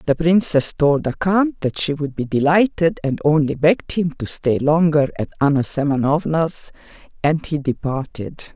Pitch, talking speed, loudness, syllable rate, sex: 150 Hz, 160 wpm, -19 LUFS, 4.6 syllables/s, female